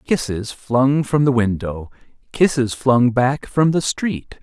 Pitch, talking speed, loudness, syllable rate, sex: 130 Hz, 150 wpm, -18 LUFS, 3.5 syllables/s, male